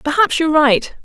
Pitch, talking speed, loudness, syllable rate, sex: 310 Hz, 175 wpm, -14 LUFS, 5.7 syllables/s, female